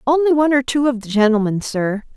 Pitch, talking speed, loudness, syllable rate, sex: 250 Hz, 220 wpm, -17 LUFS, 6.2 syllables/s, female